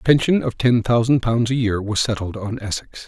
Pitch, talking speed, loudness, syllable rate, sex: 115 Hz, 235 wpm, -20 LUFS, 5.3 syllables/s, male